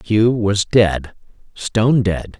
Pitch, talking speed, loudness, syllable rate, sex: 105 Hz, 125 wpm, -16 LUFS, 3.1 syllables/s, male